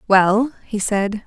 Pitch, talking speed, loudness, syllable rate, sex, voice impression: 210 Hz, 145 wpm, -18 LUFS, 3.1 syllables/s, female, feminine, adult-like, slightly cool, calm, slightly sweet